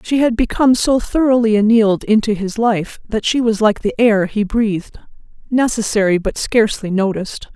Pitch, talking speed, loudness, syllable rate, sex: 220 Hz, 160 wpm, -16 LUFS, 5.3 syllables/s, female